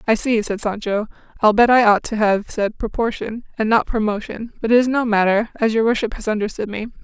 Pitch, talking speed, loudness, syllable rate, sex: 220 Hz, 220 wpm, -19 LUFS, 5.7 syllables/s, female